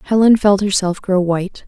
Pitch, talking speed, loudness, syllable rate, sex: 195 Hz, 180 wpm, -15 LUFS, 5.2 syllables/s, female